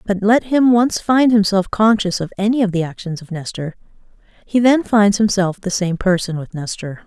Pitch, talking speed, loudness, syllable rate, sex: 200 Hz, 195 wpm, -17 LUFS, 5.0 syllables/s, female